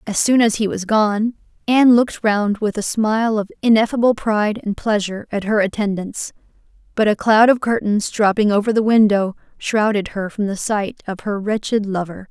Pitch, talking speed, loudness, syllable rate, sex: 210 Hz, 185 wpm, -18 LUFS, 5.2 syllables/s, female